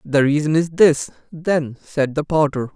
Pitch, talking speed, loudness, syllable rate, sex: 150 Hz, 175 wpm, -18 LUFS, 4.3 syllables/s, male